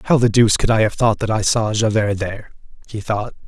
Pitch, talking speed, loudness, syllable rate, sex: 110 Hz, 240 wpm, -17 LUFS, 5.9 syllables/s, male